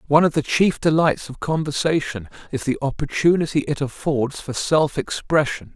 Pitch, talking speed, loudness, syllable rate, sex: 145 Hz, 155 wpm, -21 LUFS, 5.1 syllables/s, male